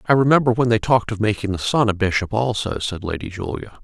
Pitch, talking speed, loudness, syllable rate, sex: 110 Hz, 235 wpm, -20 LUFS, 6.4 syllables/s, male